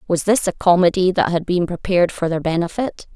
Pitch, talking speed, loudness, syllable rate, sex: 180 Hz, 210 wpm, -18 LUFS, 5.8 syllables/s, female